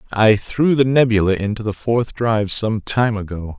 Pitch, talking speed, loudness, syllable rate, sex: 110 Hz, 185 wpm, -17 LUFS, 4.8 syllables/s, male